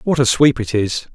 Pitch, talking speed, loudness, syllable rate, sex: 120 Hz, 260 wpm, -16 LUFS, 5.0 syllables/s, male